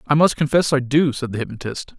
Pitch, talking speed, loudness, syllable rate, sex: 140 Hz, 240 wpm, -19 LUFS, 6.0 syllables/s, male